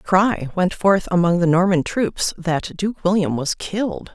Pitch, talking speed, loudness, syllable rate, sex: 180 Hz, 190 wpm, -19 LUFS, 4.2 syllables/s, female